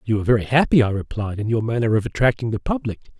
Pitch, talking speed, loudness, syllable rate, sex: 115 Hz, 245 wpm, -20 LUFS, 7.2 syllables/s, male